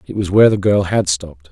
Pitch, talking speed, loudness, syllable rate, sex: 90 Hz, 275 wpm, -15 LUFS, 6.6 syllables/s, male